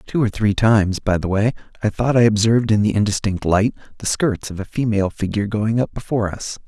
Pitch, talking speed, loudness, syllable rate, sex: 105 Hz, 225 wpm, -19 LUFS, 6.0 syllables/s, male